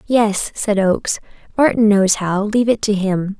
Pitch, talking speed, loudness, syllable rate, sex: 205 Hz, 175 wpm, -16 LUFS, 4.6 syllables/s, female